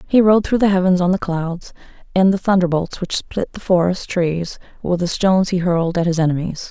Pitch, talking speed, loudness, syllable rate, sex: 180 Hz, 215 wpm, -18 LUFS, 5.6 syllables/s, female